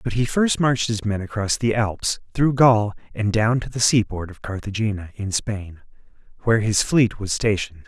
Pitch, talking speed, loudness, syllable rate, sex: 110 Hz, 190 wpm, -21 LUFS, 5.1 syllables/s, male